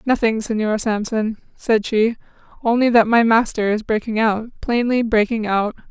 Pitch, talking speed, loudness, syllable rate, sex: 225 Hz, 150 wpm, -18 LUFS, 4.7 syllables/s, female